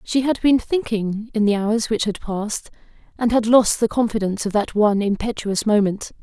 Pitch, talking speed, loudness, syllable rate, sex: 215 Hz, 195 wpm, -20 LUFS, 5.2 syllables/s, female